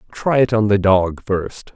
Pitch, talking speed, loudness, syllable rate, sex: 105 Hz, 205 wpm, -17 LUFS, 4.0 syllables/s, male